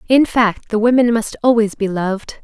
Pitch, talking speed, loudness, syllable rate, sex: 220 Hz, 195 wpm, -16 LUFS, 5.1 syllables/s, female